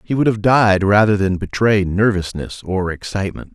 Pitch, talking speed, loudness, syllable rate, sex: 100 Hz, 170 wpm, -17 LUFS, 4.9 syllables/s, male